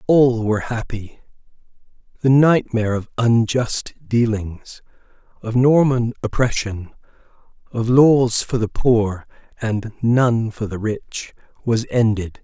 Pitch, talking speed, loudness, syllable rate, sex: 115 Hz, 105 wpm, -19 LUFS, 3.7 syllables/s, male